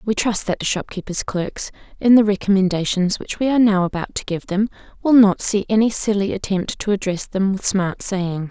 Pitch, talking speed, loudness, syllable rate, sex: 200 Hz, 205 wpm, -19 LUFS, 5.2 syllables/s, female